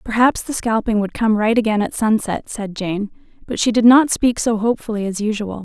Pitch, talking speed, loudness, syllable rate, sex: 220 Hz, 215 wpm, -18 LUFS, 5.4 syllables/s, female